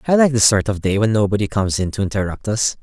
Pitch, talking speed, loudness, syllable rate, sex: 105 Hz, 275 wpm, -18 LUFS, 6.8 syllables/s, male